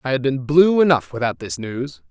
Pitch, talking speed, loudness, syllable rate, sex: 130 Hz, 230 wpm, -19 LUFS, 5.1 syllables/s, male